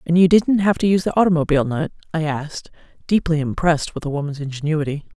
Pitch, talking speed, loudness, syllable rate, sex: 160 Hz, 195 wpm, -19 LUFS, 6.8 syllables/s, female